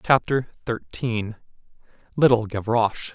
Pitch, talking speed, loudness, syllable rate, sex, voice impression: 115 Hz, 55 wpm, -23 LUFS, 4.2 syllables/s, male, very masculine, very adult-like, very middle-aged, very thick, tensed, slightly powerful, bright, soft, clear, fluent, cool, very intellectual, refreshing, very sincere, very calm, slightly mature, very friendly, very reassuring, slightly unique, elegant, slightly wild, very sweet, lively, kind